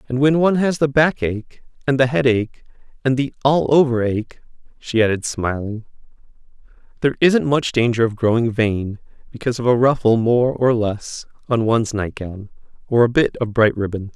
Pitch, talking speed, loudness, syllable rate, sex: 120 Hz, 180 wpm, -18 LUFS, 5.1 syllables/s, male